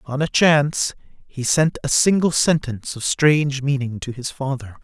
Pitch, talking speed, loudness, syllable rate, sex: 140 Hz, 175 wpm, -19 LUFS, 4.9 syllables/s, male